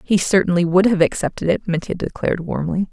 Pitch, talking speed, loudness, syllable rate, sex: 180 Hz, 185 wpm, -18 LUFS, 6.1 syllables/s, female